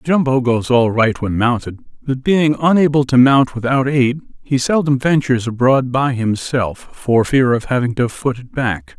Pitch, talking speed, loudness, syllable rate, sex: 130 Hz, 180 wpm, -16 LUFS, 4.5 syllables/s, male